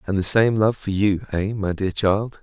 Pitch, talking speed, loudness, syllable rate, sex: 100 Hz, 220 wpm, -21 LUFS, 4.6 syllables/s, male